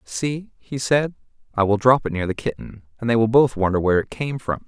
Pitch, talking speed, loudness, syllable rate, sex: 115 Hz, 245 wpm, -21 LUFS, 5.5 syllables/s, male